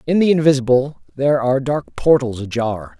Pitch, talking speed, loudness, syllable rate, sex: 135 Hz, 160 wpm, -17 LUFS, 5.8 syllables/s, male